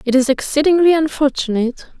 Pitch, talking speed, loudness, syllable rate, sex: 280 Hz, 120 wpm, -16 LUFS, 6.0 syllables/s, female